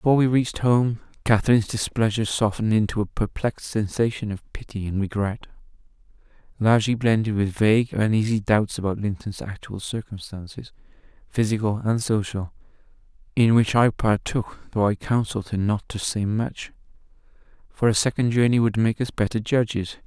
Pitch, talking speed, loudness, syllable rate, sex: 110 Hz, 145 wpm, -23 LUFS, 5.5 syllables/s, male